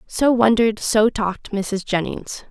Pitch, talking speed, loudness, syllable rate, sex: 210 Hz, 145 wpm, -19 LUFS, 4.3 syllables/s, female